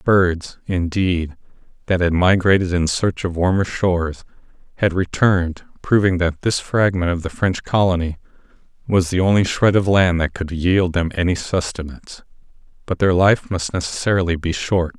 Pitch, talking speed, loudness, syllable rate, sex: 90 Hz, 155 wpm, -18 LUFS, 4.8 syllables/s, male